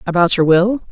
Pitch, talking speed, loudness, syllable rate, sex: 185 Hz, 200 wpm, -13 LUFS, 5.5 syllables/s, female